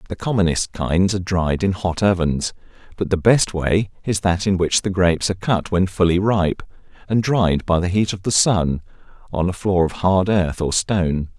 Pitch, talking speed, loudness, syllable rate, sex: 90 Hz, 205 wpm, -19 LUFS, 4.9 syllables/s, male